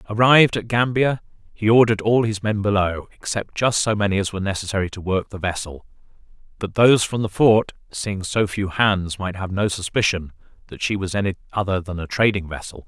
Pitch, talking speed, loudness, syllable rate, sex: 100 Hz, 195 wpm, -20 LUFS, 5.7 syllables/s, male